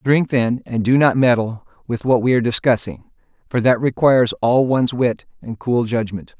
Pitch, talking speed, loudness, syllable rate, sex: 120 Hz, 190 wpm, -18 LUFS, 5.1 syllables/s, male